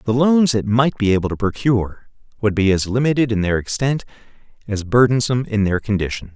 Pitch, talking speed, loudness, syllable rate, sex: 115 Hz, 190 wpm, -18 LUFS, 5.9 syllables/s, male